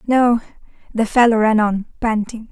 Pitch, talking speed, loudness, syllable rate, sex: 225 Hz, 145 wpm, -17 LUFS, 4.7 syllables/s, female